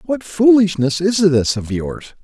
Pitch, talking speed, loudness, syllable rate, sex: 175 Hz, 160 wpm, -15 LUFS, 3.9 syllables/s, male